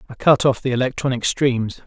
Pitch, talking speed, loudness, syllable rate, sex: 130 Hz, 195 wpm, -19 LUFS, 5.4 syllables/s, male